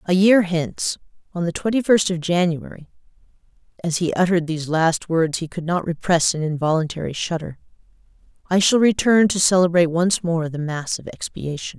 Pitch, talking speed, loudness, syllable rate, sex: 175 Hz, 170 wpm, -20 LUFS, 3.5 syllables/s, female